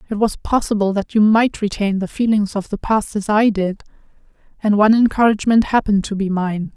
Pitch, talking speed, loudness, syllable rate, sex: 210 Hz, 195 wpm, -17 LUFS, 5.7 syllables/s, female